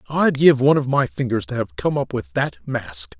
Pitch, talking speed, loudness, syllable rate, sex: 120 Hz, 245 wpm, -20 LUFS, 5.3 syllables/s, male